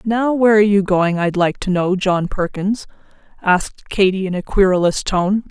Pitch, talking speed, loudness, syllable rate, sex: 195 Hz, 185 wpm, -17 LUFS, 5.0 syllables/s, female